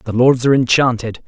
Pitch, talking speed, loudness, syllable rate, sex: 125 Hz, 190 wpm, -14 LUFS, 6.3 syllables/s, male